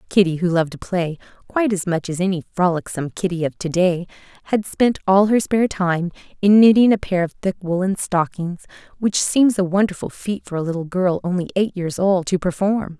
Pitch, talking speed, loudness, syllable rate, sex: 185 Hz, 205 wpm, -19 LUFS, 5.5 syllables/s, female